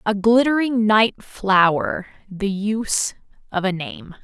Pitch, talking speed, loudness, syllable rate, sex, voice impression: 205 Hz, 125 wpm, -19 LUFS, 3.7 syllables/s, female, very feminine, slightly young, thin, very tensed, powerful, very bright, hard, very clear, fluent, slightly cute, cool, intellectual, very refreshing, slightly sincere, calm, friendly, reassuring, slightly unique, slightly elegant, wild, slightly sweet, lively, strict, intense